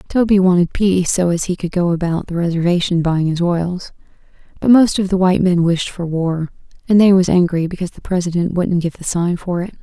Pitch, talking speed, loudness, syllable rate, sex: 180 Hz, 220 wpm, -16 LUFS, 5.7 syllables/s, female